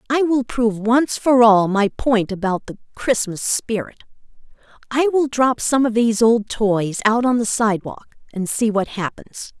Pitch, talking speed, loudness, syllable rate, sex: 225 Hz, 175 wpm, -18 LUFS, 4.5 syllables/s, female